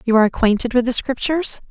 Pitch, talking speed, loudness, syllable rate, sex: 245 Hz, 210 wpm, -18 LUFS, 7.2 syllables/s, female